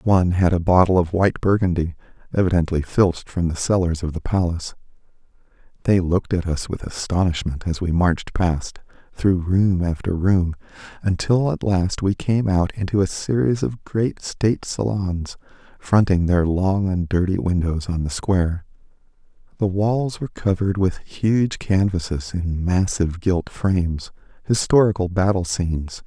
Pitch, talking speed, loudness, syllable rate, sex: 90 Hz, 145 wpm, -21 LUFS, 4.8 syllables/s, male